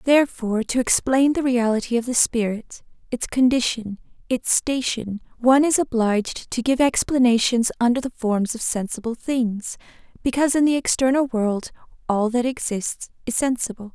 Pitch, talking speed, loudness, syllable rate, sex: 240 Hz, 140 wpm, -21 LUFS, 5.0 syllables/s, female